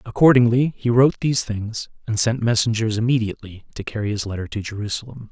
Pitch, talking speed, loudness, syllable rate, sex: 115 Hz, 170 wpm, -20 LUFS, 6.4 syllables/s, male